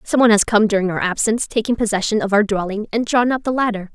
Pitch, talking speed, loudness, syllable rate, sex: 215 Hz, 260 wpm, -18 LUFS, 6.8 syllables/s, female